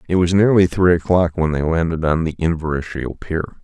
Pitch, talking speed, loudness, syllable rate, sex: 85 Hz, 200 wpm, -18 LUFS, 5.7 syllables/s, male